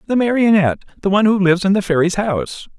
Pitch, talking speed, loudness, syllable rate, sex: 190 Hz, 215 wpm, -16 LUFS, 7.4 syllables/s, male